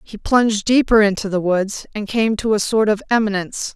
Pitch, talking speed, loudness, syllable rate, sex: 210 Hz, 210 wpm, -18 LUFS, 5.4 syllables/s, female